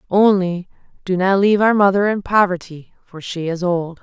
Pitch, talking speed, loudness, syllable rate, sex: 190 Hz, 180 wpm, -17 LUFS, 5.0 syllables/s, female